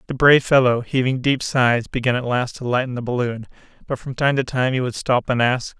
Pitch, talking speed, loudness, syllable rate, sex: 125 Hz, 240 wpm, -19 LUFS, 5.6 syllables/s, male